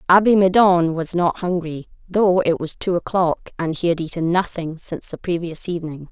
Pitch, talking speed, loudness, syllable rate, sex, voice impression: 175 Hz, 185 wpm, -20 LUFS, 5.1 syllables/s, female, feminine, very gender-neutral, young, slightly thin, slightly tensed, slightly weak, bright, hard, clear, fluent, slightly cool, very intellectual, slightly refreshing, sincere, very calm, slightly friendly, slightly reassuring, unique, elegant, slightly sweet, strict, slightly intense, sharp